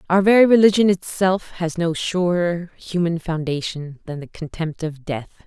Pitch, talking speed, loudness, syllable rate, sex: 170 Hz, 155 wpm, -20 LUFS, 4.6 syllables/s, female